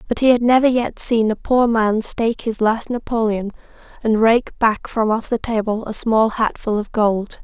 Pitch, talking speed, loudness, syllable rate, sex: 225 Hz, 200 wpm, -18 LUFS, 4.6 syllables/s, female